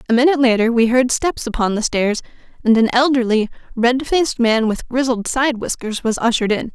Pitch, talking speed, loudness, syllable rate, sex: 240 Hz, 195 wpm, -17 LUFS, 5.6 syllables/s, female